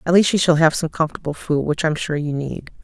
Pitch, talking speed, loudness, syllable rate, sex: 160 Hz, 275 wpm, -19 LUFS, 6.1 syllables/s, female